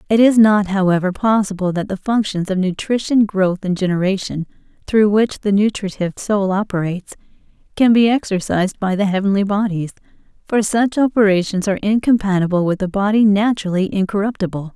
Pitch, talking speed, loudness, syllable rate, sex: 200 Hz, 145 wpm, -17 LUFS, 5.7 syllables/s, female